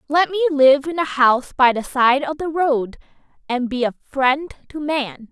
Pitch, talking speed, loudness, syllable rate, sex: 275 Hz, 205 wpm, -18 LUFS, 4.4 syllables/s, female